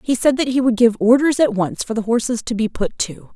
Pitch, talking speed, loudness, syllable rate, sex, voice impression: 230 Hz, 285 wpm, -18 LUFS, 5.6 syllables/s, female, feminine, adult-like, clear, fluent, intellectual, slightly elegant